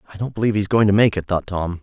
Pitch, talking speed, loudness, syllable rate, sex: 100 Hz, 330 wpm, -19 LUFS, 7.7 syllables/s, male